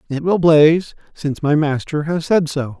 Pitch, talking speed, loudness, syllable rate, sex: 155 Hz, 195 wpm, -16 LUFS, 5.0 syllables/s, male